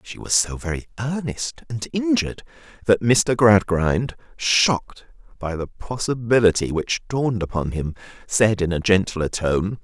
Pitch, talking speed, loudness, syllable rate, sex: 105 Hz, 140 wpm, -21 LUFS, 4.4 syllables/s, male